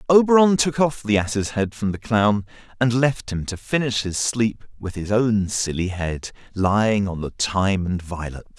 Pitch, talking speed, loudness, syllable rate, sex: 110 Hz, 190 wpm, -21 LUFS, 4.5 syllables/s, male